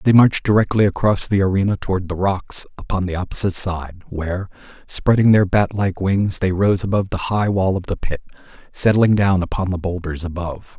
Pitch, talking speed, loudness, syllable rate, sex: 95 Hz, 190 wpm, -19 LUFS, 5.6 syllables/s, male